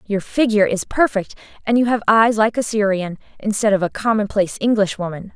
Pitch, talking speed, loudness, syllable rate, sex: 210 Hz, 190 wpm, -18 LUFS, 5.7 syllables/s, female